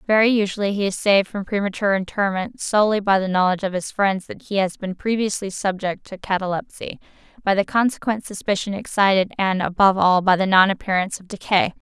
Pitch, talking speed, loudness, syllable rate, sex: 195 Hz, 185 wpm, -20 LUFS, 6.1 syllables/s, female